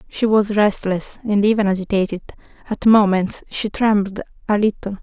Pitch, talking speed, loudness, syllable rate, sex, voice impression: 205 Hz, 145 wpm, -18 LUFS, 5.1 syllables/s, female, feminine, slightly young, slightly weak, soft, slightly halting, calm, slightly friendly, kind, modest